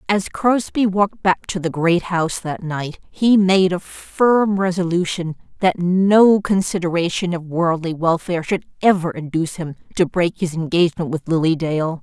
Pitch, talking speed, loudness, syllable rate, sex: 175 Hz, 160 wpm, -18 LUFS, 4.6 syllables/s, female